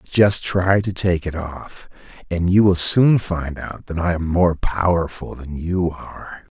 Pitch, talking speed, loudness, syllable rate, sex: 90 Hz, 180 wpm, -19 LUFS, 3.9 syllables/s, male